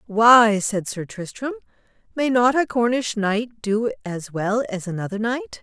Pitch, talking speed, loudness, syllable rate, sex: 225 Hz, 160 wpm, -21 LUFS, 4.1 syllables/s, female